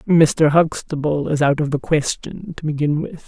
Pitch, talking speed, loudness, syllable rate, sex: 155 Hz, 185 wpm, -19 LUFS, 4.5 syllables/s, female